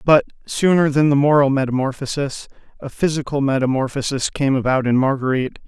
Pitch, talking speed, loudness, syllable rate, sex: 140 Hz, 140 wpm, -18 LUFS, 5.8 syllables/s, male